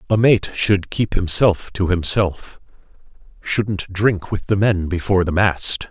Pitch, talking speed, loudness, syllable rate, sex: 95 Hz, 140 wpm, -18 LUFS, 3.9 syllables/s, male